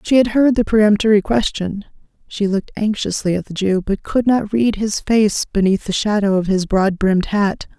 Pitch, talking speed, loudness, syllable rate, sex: 205 Hz, 200 wpm, -17 LUFS, 5.1 syllables/s, female